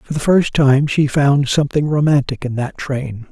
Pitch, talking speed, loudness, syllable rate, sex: 140 Hz, 200 wpm, -16 LUFS, 4.6 syllables/s, male